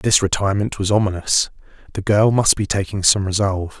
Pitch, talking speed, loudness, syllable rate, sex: 100 Hz, 175 wpm, -18 LUFS, 5.7 syllables/s, male